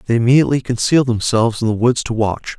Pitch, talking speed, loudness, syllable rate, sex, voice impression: 120 Hz, 210 wpm, -16 LUFS, 7.1 syllables/s, male, masculine, adult-like, slightly cool, slightly refreshing, sincere, friendly